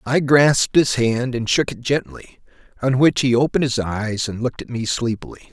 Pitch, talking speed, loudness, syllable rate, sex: 125 Hz, 205 wpm, -19 LUFS, 5.3 syllables/s, male